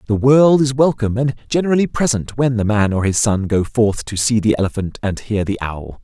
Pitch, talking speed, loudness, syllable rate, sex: 115 Hz, 230 wpm, -17 LUFS, 5.5 syllables/s, male